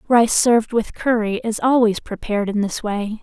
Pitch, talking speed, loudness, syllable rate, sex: 220 Hz, 185 wpm, -19 LUFS, 5.0 syllables/s, female